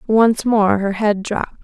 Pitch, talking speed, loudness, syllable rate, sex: 210 Hz, 185 wpm, -17 LUFS, 4.3 syllables/s, female